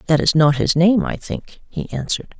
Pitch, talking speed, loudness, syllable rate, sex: 170 Hz, 225 wpm, -18 LUFS, 5.1 syllables/s, female